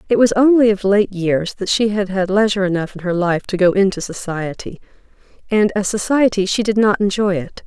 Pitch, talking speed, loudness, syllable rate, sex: 200 Hz, 210 wpm, -17 LUFS, 5.5 syllables/s, female